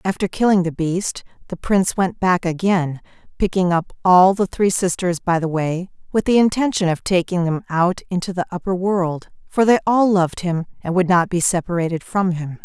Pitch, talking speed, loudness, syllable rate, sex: 180 Hz, 195 wpm, -19 LUFS, 5.1 syllables/s, female